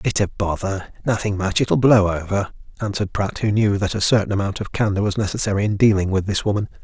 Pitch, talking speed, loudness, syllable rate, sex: 100 Hz, 200 wpm, -20 LUFS, 6.1 syllables/s, male